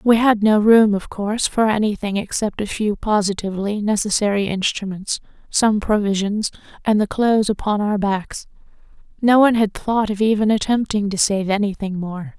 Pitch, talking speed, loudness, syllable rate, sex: 210 Hz, 170 wpm, -19 LUFS, 5.1 syllables/s, female